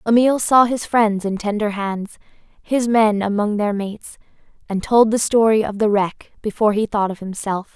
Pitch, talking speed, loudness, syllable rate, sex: 215 Hz, 185 wpm, -18 LUFS, 4.9 syllables/s, female